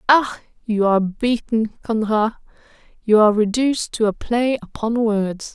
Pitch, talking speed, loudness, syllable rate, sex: 220 Hz, 140 wpm, -19 LUFS, 4.6 syllables/s, female